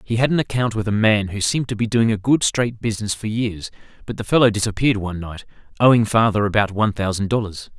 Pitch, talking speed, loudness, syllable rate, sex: 110 Hz, 230 wpm, -19 LUFS, 6.5 syllables/s, male